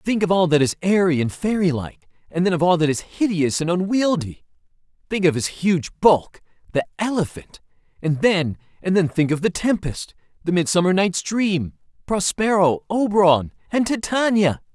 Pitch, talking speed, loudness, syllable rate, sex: 180 Hz, 155 wpm, -20 LUFS, 5.3 syllables/s, male